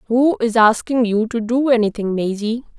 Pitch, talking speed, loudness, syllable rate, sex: 230 Hz, 170 wpm, -17 LUFS, 5.0 syllables/s, female